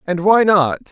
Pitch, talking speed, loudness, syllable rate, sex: 180 Hz, 195 wpm, -14 LUFS, 4.5 syllables/s, male